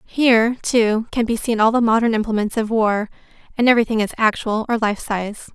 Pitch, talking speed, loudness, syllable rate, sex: 225 Hz, 195 wpm, -18 LUFS, 5.5 syllables/s, female